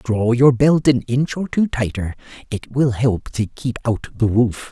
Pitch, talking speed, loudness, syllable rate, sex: 125 Hz, 205 wpm, -18 LUFS, 4.2 syllables/s, male